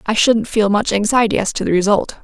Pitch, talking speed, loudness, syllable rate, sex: 215 Hz, 240 wpm, -16 LUFS, 5.7 syllables/s, female